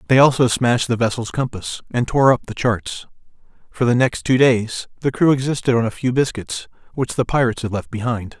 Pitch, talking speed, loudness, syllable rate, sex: 120 Hz, 205 wpm, -19 LUFS, 5.6 syllables/s, male